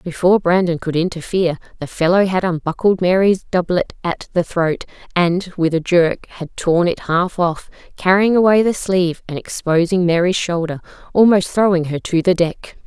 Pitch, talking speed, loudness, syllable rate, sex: 175 Hz, 170 wpm, -17 LUFS, 4.9 syllables/s, female